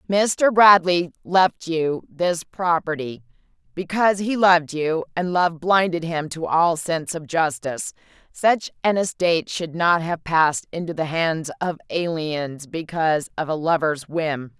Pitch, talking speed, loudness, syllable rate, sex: 165 Hz, 150 wpm, -21 LUFS, 4.3 syllables/s, female